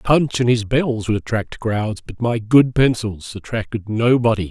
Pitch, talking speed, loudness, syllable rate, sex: 115 Hz, 175 wpm, -19 LUFS, 4.3 syllables/s, male